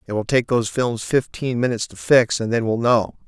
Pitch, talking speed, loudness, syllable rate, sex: 115 Hz, 240 wpm, -20 LUFS, 5.6 syllables/s, male